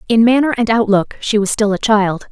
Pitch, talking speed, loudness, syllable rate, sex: 220 Hz, 235 wpm, -14 LUFS, 5.3 syllables/s, female